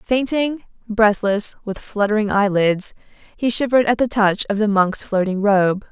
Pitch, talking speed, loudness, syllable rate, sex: 215 Hz, 150 wpm, -18 LUFS, 4.4 syllables/s, female